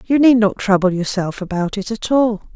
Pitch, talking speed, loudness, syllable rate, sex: 210 Hz, 210 wpm, -17 LUFS, 5.1 syllables/s, female